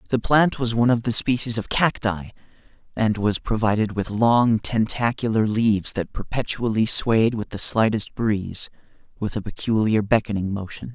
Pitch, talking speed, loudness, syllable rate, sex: 110 Hz, 155 wpm, -22 LUFS, 4.9 syllables/s, male